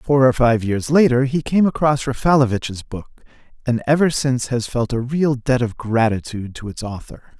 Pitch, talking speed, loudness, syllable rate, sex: 125 Hz, 185 wpm, -18 LUFS, 5.0 syllables/s, male